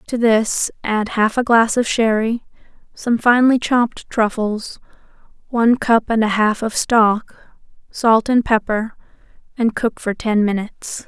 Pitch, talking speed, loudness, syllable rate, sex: 225 Hz, 145 wpm, -17 LUFS, 4.3 syllables/s, female